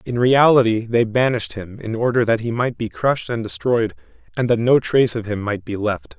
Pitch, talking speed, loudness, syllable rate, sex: 115 Hz, 225 wpm, -19 LUFS, 5.4 syllables/s, male